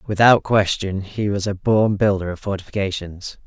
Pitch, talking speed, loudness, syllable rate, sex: 100 Hz, 155 wpm, -19 LUFS, 4.9 syllables/s, male